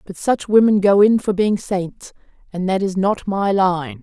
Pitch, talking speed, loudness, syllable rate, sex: 190 Hz, 210 wpm, -17 LUFS, 4.2 syllables/s, female